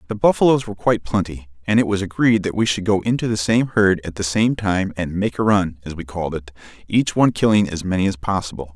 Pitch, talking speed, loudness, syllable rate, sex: 95 Hz, 245 wpm, -19 LUFS, 6.1 syllables/s, male